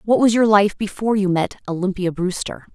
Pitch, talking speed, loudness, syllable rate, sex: 195 Hz, 195 wpm, -19 LUFS, 5.7 syllables/s, female